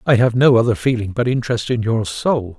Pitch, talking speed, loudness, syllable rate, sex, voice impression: 115 Hz, 230 wpm, -17 LUFS, 5.7 syllables/s, male, very masculine, very adult-like, very middle-aged, very thick, slightly tensed, slightly powerful, bright, hard, slightly clear, fluent, cool, intellectual, sincere, calm, mature, slightly friendly, reassuring, slightly wild, kind